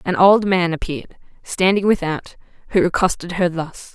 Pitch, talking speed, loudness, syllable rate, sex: 175 Hz, 150 wpm, -18 LUFS, 5.0 syllables/s, female